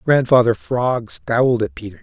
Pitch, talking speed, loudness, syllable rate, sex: 115 Hz, 150 wpm, -17 LUFS, 4.7 syllables/s, male